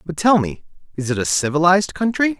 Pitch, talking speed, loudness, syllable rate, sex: 170 Hz, 200 wpm, -18 LUFS, 6.1 syllables/s, male